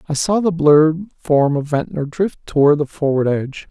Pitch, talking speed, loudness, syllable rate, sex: 155 Hz, 195 wpm, -17 LUFS, 4.9 syllables/s, male